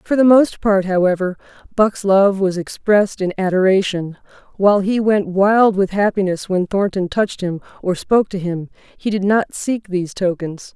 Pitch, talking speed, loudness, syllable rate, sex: 195 Hz, 175 wpm, -17 LUFS, 4.8 syllables/s, female